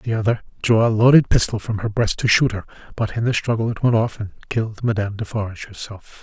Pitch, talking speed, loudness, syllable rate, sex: 110 Hz, 230 wpm, -20 LUFS, 6.1 syllables/s, male